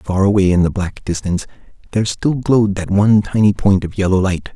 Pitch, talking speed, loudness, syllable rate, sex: 100 Hz, 210 wpm, -16 LUFS, 6.0 syllables/s, male